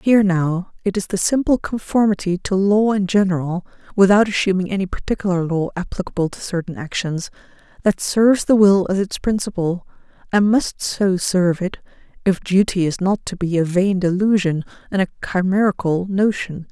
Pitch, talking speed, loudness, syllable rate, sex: 190 Hz, 160 wpm, -19 LUFS, 5.2 syllables/s, female